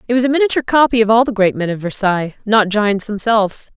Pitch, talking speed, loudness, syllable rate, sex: 220 Hz, 240 wpm, -15 LUFS, 6.7 syllables/s, female